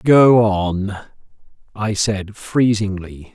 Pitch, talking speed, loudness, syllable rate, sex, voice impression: 105 Hz, 90 wpm, -17 LUFS, 2.8 syllables/s, male, masculine, adult-like, slightly thick, slightly clear, sincere